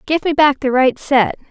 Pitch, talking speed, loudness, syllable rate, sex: 275 Hz, 240 wpm, -15 LUFS, 4.7 syllables/s, female